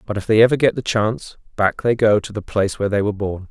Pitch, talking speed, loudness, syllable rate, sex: 105 Hz, 290 wpm, -18 LUFS, 6.9 syllables/s, male